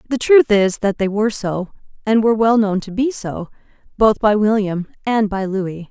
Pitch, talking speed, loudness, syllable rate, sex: 210 Hz, 205 wpm, -17 LUFS, 5.2 syllables/s, female